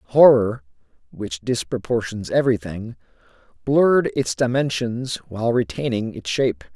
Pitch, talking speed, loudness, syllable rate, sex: 115 Hz, 100 wpm, -21 LUFS, 4.7 syllables/s, male